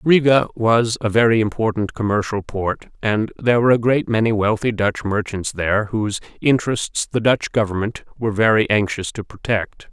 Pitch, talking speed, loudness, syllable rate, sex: 110 Hz, 165 wpm, -19 LUFS, 5.2 syllables/s, male